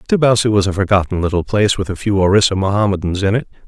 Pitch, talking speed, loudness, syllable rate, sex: 100 Hz, 210 wpm, -15 LUFS, 7.2 syllables/s, male